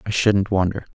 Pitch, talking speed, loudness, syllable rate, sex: 100 Hz, 190 wpm, -20 LUFS, 5.3 syllables/s, male